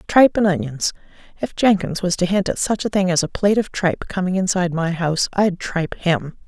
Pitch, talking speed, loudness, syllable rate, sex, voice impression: 180 Hz, 220 wpm, -19 LUFS, 6.0 syllables/s, female, feminine, adult-like, tensed, slightly powerful, hard, clear, fluent, slightly raspy, intellectual, calm, reassuring, elegant, slightly strict, modest